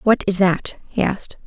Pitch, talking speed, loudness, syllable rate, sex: 195 Hz, 205 wpm, -20 LUFS, 5.0 syllables/s, female